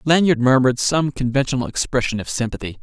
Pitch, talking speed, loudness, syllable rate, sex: 130 Hz, 150 wpm, -19 LUFS, 6.3 syllables/s, male